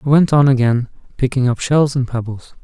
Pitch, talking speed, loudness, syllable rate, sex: 130 Hz, 205 wpm, -16 LUFS, 5.3 syllables/s, male